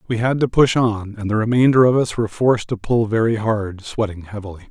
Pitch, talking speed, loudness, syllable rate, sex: 110 Hz, 230 wpm, -18 LUFS, 5.9 syllables/s, male